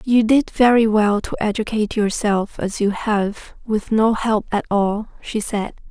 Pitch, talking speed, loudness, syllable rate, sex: 215 Hz, 175 wpm, -19 LUFS, 4.2 syllables/s, female